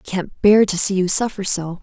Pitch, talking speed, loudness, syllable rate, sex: 190 Hz, 265 wpm, -17 LUFS, 5.4 syllables/s, female